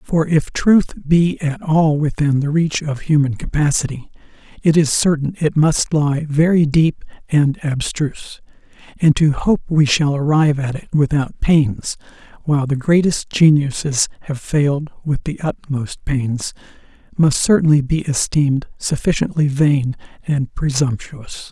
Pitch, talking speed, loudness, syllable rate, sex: 150 Hz, 140 wpm, -17 LUFS, 4.2 syllables/s, male